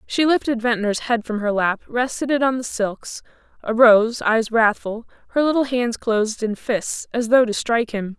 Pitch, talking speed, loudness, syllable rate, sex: 230 Hz, 190 wpm, -20 LUFS, 4.9 syllables/s, female